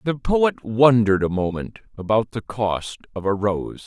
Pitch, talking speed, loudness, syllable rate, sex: 115 Hz, 170 wpm, -21 LUFS, 4.4 syllables/s, male